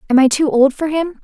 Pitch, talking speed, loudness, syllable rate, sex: 285 Hz, 290 wpm, -14 LUFS, 5.8 syllables/s, female